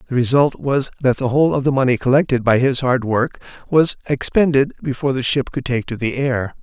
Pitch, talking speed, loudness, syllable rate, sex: 130 Hz, 215 wpm, -18 LUFS, 5.7 syllables/s, male